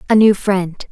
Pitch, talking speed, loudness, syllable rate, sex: 200 Hz, 195 wpm, -15 LUFS, 4.1 syllables/s, female